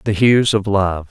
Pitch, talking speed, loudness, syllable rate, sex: 100 Hz, 220 wpm, -15 LUFS, 3.7 syllables/s, male